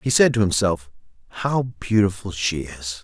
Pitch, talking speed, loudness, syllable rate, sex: 95 Hz, 160 wpm, -21 LUFS, 4.5 syllables/s, male